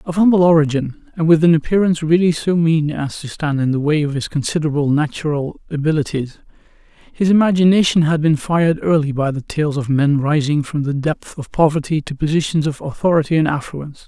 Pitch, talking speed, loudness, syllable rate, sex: 155 Hz, 190 wpm, -17 LUFS, 5.8 syllables/s, male